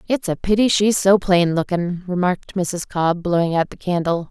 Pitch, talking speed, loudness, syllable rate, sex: 180 Hz, 195 wpm, -19 LUFS, 5.0 syllables/s, female